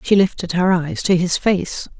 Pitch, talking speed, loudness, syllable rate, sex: 185 Hz, 210 wpm, -18 LUFS, 4.4 syllables/s, female